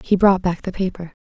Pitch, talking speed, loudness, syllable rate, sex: 185 Hz, 245 wpm, -19 LUFS, 5.7 syllables/s, female